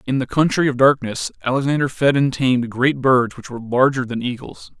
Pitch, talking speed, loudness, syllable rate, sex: 130 Hz, 200 wpm, -18 LUFS, 5.6 syllables/s, male